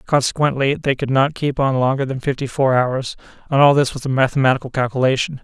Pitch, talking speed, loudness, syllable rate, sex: 135 Hz, 190 wpm, -18 LUFS, 6.2 syllables/s, male